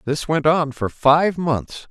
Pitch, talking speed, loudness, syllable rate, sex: 150 Hz, 190 wpm, -19 LUFS, 3.4 syllables/s, male